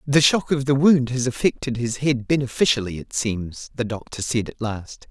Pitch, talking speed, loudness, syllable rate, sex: 125 Hz, 200 wpm, -22 LUFS, 4.9 syllables/s, male